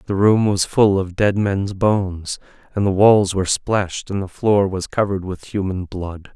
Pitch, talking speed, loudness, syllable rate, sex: 95 Hz, 200 wpm, -19 LUFS, 4.7 syllables/s, male